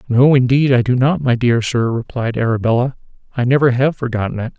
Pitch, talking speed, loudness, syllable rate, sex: 125 Hz, 195 wpm, -16 LUFS, 5.8 syllables/s, male